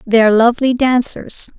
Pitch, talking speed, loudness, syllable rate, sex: 235 Hz, 115 wpm, -13 LUFS, 4.9 syllables/s, female